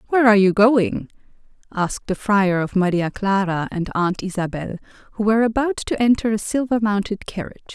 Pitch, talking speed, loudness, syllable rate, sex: 205 Hz, 170 wpm, -20 LUFS, 5.7 syllables/s, female